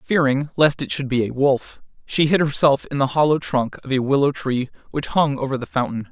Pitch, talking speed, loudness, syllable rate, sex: 135 Hz, 225 wpm, -20 LUFS, 5.3 syllables/s, male